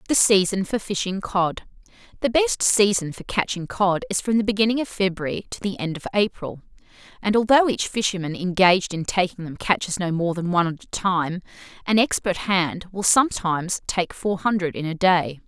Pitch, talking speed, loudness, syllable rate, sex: 190 Hz, 185 wpm, -22 LUFS, 5.3 syllables/s, female